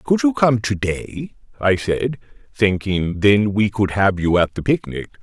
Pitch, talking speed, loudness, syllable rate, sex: 105 Hz, 185 wpm, -18 LUFS, 4.0 syllables/s, male